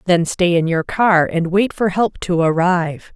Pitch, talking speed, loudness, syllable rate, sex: 175 Hz, 210 wpm, -17 LUFS, 4.4 syllables/s, female